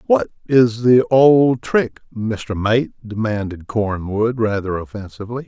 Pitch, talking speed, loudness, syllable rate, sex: 115 Hz, 120 wpm, -18 LUFS, 4.0 syllables/s, male